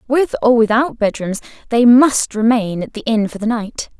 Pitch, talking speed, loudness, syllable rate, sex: 230 Hz, 195 wpm, -15 LUFS, 4.8 syllables/s, female